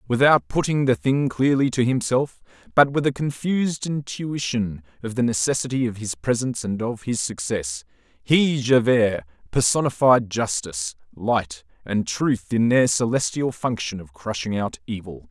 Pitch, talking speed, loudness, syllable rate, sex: 115 Hz, 145 wpm, -22 LUFS, 4.6 syllables/s, male